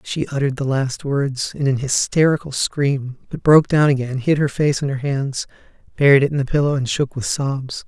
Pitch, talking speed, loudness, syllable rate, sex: 140 Hz, 215 wpm, -19 LUFS, 5.2 syllables/s, male